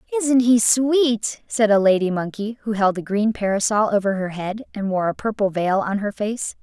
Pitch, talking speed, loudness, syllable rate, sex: 210 Hz, 210 wpm, -20 LUFS, 4.9 syllables/s, female